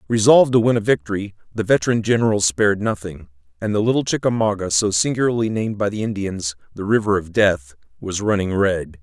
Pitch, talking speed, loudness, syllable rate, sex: 100 Hz, 180 wpm, -19 LUFS, 6.1 syllables/s, male